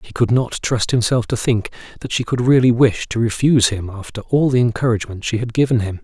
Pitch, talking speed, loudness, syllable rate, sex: 115 Hz, 230 wpm, -17 LUFS, 6.0 syllables/s, male